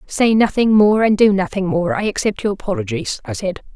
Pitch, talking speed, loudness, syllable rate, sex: 195 Hz, 210 wpm, -17 LUFS, 5.4 syllables/s, female